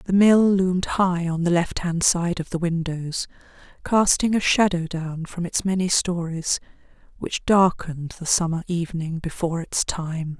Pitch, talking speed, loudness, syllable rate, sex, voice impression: 175 Hz, 160 wpm, -22 LUFS, 4.6 syllables/s, female, feminine, adult-like, slightly powerful, soft, slightly muffled, slightly raspy, friendly, unique, lively, slightly kind, slightly intense